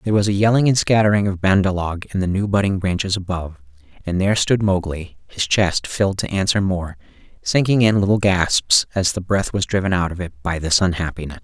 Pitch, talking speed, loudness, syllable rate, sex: 95 Hz, 210 wpm, -19 LUFS, 5.8 syllables/s, male